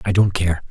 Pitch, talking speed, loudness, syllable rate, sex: 95 Hz, 255 wpm, -19 LUFS, 5.6 syllables/s, male